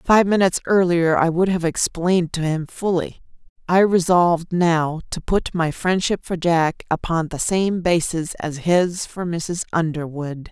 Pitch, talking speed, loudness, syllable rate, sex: 170 Hz, 160 wpm, -20 LUFS, 4.2 syllables/s, female